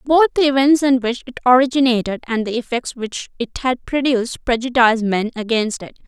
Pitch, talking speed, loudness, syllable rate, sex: 245 Hz, 180 wpm, -17 LUFS, 5.6 syllables/s, female